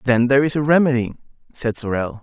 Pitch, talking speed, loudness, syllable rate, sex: 130 Hz, 190 wpm, -18 LUFS, 6.4 syllables/s, male